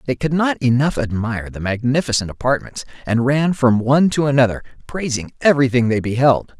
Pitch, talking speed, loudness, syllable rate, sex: 125 Hz, 165 wpm, -18 LUFS, 5.7 syllables/s, male